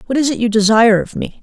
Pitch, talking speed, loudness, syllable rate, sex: 230 Hz, 295 wpm, -13 LUFS, 7.1 syllables/s, female